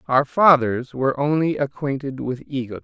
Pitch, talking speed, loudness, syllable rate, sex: 135 Hz, 150 wpm, -20 LUFS, 5.2 syllables/s, male